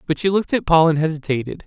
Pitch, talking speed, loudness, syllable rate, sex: 165 Hz, 255 wpm, -18 LUFS, 7.2 syllables/s, male